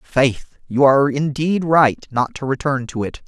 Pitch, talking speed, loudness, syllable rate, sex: 135 Hz, 185 wpm, -18 LUFS, 4.3 syllables/s, male